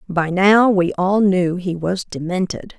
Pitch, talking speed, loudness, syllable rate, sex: 185 Hz, 170 wpm, -17 LUFS, 3.9 syllables/s, female